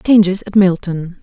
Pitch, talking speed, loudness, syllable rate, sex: 190 Hz, 145 wpm, -14 LUFS, 4.6 syllables/s, female